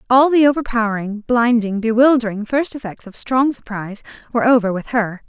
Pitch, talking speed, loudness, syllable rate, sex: 230 Hz, 160 wpm, -17 LUFS, 5.7 syllables/s, female